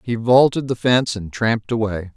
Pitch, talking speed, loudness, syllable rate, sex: 115 Hz, 195 wpm, -18 LUFS, 5.4 syllables/s, male